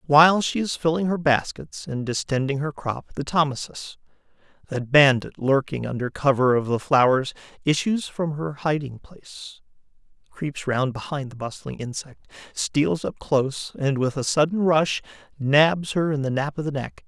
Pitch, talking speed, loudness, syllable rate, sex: 145 Hz, 165 wpm, -23 LUFS, 4.7 syllables/s, male